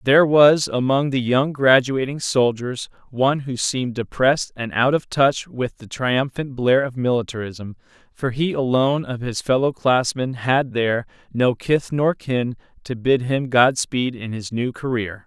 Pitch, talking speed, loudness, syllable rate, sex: 125 Hz, 170 wpm, -20 LUFS, 4.5 syllables/s, male